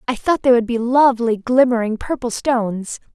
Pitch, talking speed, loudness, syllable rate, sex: 240 Hz, 170 wpm, -17 LUFS, 5.2 syllables/s, female